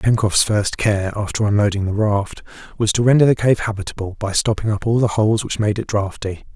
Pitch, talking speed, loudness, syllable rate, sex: 105 Hz, 210 wpm, -18 LUFS, 5.6 syllables/s, male